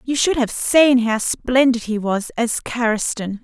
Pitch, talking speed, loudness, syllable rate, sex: 240 Hz, 175 wpm, -18 LUFS, 4.0 syllables/s, female